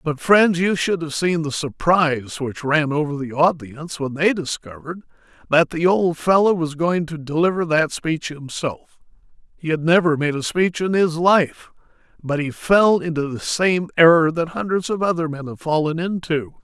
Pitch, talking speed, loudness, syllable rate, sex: 160 Hz, 185 wpm, -19 LUFS, 4.8 syllables/s, male